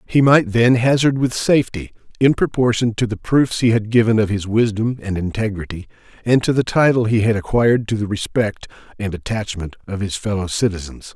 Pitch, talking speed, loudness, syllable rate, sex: 110 Hz, 190 wpm, -18 LUFS, 5.5 syllables/s, male